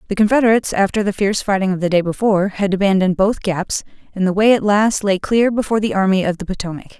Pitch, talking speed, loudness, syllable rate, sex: 200 Hz, 230 wpm, -17 LUFS, 6.9 syllables/s, female